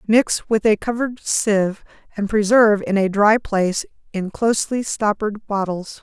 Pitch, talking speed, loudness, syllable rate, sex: 210 Hz, 150 wpm, -19 LUFS, 5.0 syllables/s, female